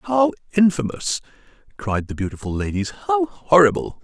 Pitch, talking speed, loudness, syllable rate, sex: 130 Hz, 105 wpm, -20 LUFS, 4.6 syllables/s, male